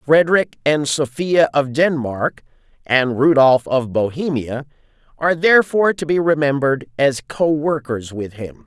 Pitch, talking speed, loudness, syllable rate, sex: 145 Hz, 125 wpm, -17 LUFS, 4.5 syllables/s, male